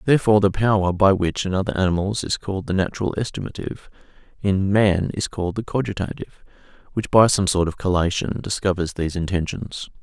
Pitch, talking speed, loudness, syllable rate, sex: 95 Hz, 170 wpm, -21 LUFS, 6.5 syllables/s, male